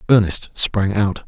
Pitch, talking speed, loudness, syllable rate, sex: 100 Hz, 140 wpm, -17 LUFS, 3.9 syllables/s, male